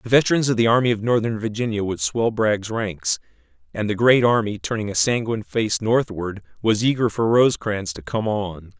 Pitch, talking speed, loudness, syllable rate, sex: 110 Hz, 190 wpm, -21 LUFS, 5.3 syllables/s, male